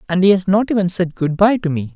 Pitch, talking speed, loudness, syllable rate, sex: 185 Hz, 305 wpm, -16 LUFS, 6.2 syllables/s, male